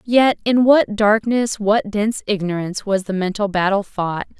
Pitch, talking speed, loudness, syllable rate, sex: 205 Hz, 165 wpm, -18 LUFS, 4.7 syllables/s, female